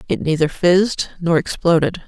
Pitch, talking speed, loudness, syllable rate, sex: 170 Hz, 145 wpm, -17 LUFS, 5.1 syllables/s, female